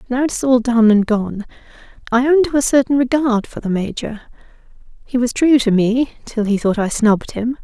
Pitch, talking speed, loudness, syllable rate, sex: 240 Hz, 210 wpm, -16 LUFS, 5.3 syllables/s, female